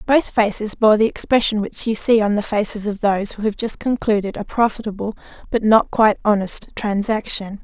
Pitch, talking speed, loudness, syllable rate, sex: 215 Hz, 190 wpm, -19 LUFS, 5.4 syllables/s, female